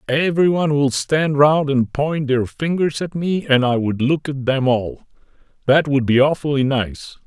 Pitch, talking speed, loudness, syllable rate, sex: 140 Hz, 190 wpm, -18 LUFS, 4.5 syllables/s, male